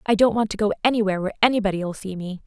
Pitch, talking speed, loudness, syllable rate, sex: 205 Hz, 245 wpm, -22 LUFS, 8.0 syllables/s, female